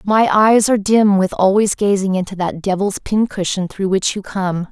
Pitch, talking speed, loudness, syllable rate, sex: 195 Hz, 190 wpm, -16 LUFS, 4.8 syllables/s, female